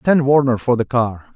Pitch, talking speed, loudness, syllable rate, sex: 125 Hz, 220 wpm, -17 LUFS, 5.2 syllables/s, male